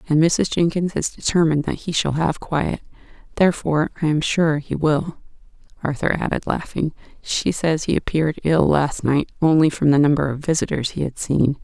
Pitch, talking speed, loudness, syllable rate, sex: 155 Hz, 180 wpm, -20 LUFS, 5.3 syllables/s, female